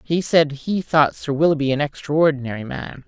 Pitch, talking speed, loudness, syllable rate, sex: 150 Hz, 175 wpm, -20 LUFS, 5.1 syllables/s, female